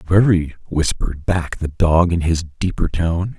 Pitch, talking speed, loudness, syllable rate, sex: 85 Hz, 160 wpm, -19 LUFS, 4.3 syllables/s, male